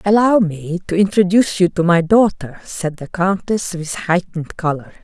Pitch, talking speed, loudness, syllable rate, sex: 180 Hz, 165 wpm, -17 LUFS, 4.9 syllables/s, female